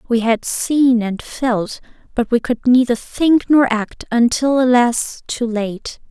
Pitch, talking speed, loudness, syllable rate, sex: 240 Hz, 155 wpm, -16 LUFS, 3.5 syllables/s, female